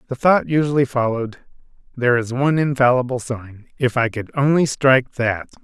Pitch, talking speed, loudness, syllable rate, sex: 130 Hz, 140 wpm, -19 LUFS, 5.5 syllables/s, male